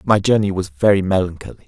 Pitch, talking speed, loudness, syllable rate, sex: 95 Hz, 180 wpm, -17 LUFS, 6.7 syllables/s, male